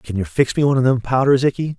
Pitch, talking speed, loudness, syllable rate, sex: 125 Hz, 305 wpm, -17 LUFS, 6.9 syllables/s, male